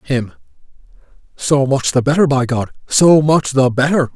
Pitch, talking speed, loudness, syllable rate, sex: 135 Hz, 160 wpm, -14 LUFS, 4.6 syllables/s, male